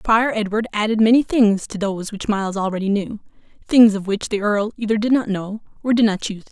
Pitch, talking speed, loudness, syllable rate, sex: 210 Hz, 230 wpm, -19 LUFS, 6.2 syllables/s, female